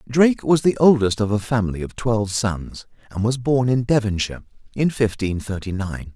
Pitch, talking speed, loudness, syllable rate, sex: 110 Hz, 185 wpm, -20 LUFS, 5.3 syllables/s, male